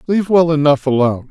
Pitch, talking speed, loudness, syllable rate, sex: 150 Hz, 185 wpm, -14 LUFS, 7.0 syllables/s, male